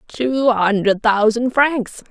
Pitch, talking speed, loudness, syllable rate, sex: 235 Hz, 115 wpm, -16 LUFS, 3.2 syllables/s, female